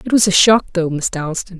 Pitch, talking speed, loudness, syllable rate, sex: 185 Hz, 265 wpm, -15 LUFS, 5.6 syllables/s, female